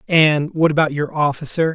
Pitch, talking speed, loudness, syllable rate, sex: 155 Hz, 170 wpm, -17 LUFS, 5.0 syllables/s, male